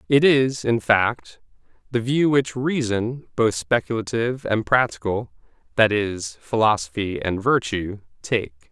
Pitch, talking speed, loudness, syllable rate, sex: 110 Hz, 125 wpm, -21 LUFS, 4.1 syllables/s, male